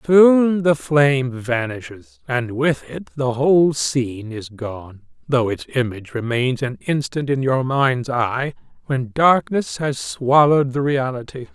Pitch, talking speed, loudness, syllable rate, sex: 135 Hz, 145 wpm, -19 LUFS, 3.9 syllables/s, male